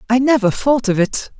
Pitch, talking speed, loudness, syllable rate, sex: 235 Hz, 215 wpm, -16 LUFS, 5.1 syllables/s, male